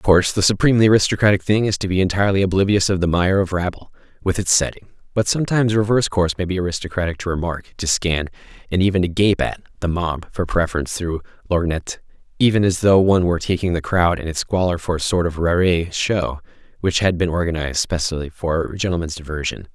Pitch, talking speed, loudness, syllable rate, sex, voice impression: 90 Hz, 210 wpm, -19 LUFS, 6.4 syllables/s, male, very masculine, very adult-like, slightly old, very thick, tensed, very powerful, slightly dark, hard, muffled, slightly fluent, slightly raspy, very cool, intellectual, very sincere, very calm, very mature, friendly, reassuring, very unique, elegant, very wild, sweet, kind, modest